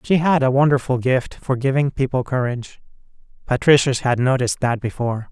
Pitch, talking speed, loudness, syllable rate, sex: 130 Hz, 160 wpm, -19 LUFS, 5.7 syllables/s, male